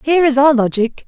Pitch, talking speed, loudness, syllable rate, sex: 270 Hz, 225 wpm, -13 LUFS, 6.2 syllables/s, female